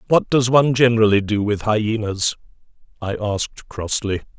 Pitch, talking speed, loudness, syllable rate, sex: 110 Hz, 135 wpm, -19 LUFS, 5.0 syllables/s, male